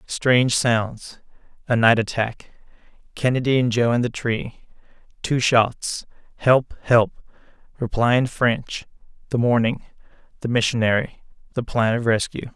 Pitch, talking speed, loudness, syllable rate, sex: 120 Hz, 85 wpm, -21 LUFS, 4.3 syllables/s, male